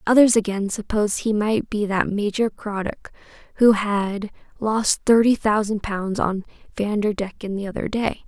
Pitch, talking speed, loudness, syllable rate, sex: 210 Hz, 145 wpm, -21 LUFS, 4.5 syllables/s, female